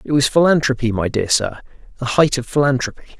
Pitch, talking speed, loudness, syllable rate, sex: 130 Hz, 190 wpm, -17 LUFS, 5.9 syllables/s, male